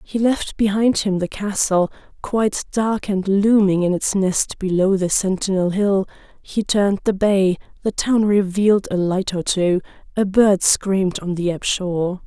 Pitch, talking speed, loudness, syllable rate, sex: 195 Hz, 170 wpm, -19 LUFS, 4.4 syllables/s, female